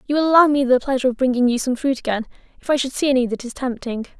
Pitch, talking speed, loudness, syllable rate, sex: 260 Hz, 285 wpm, -19 LUFS, 7.5 syllables/s, female